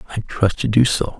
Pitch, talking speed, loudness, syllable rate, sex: 110 Hz, 200 wpm, -18 LUFS, 6.0 syllables/s, male